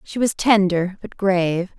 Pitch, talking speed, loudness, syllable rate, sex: 195 Hz, 170 wpm, -19 LUFS, 4.4 syllables/s, female